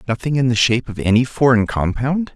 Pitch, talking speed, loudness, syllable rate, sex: 125 Hz, 205 wpm, -17 LUFS, 6.0 syllables/s, male